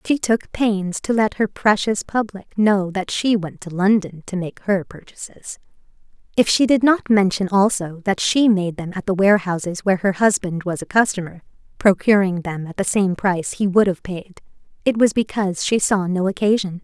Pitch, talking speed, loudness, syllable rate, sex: 195 Hz, 190 wpm, -19 LUFS, 5.0 syllables/s, female